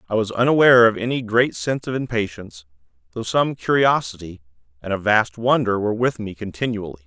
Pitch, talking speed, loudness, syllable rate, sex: 110 Hz, 170 wpm, -20 LUFS, 6.0 syllables/s, male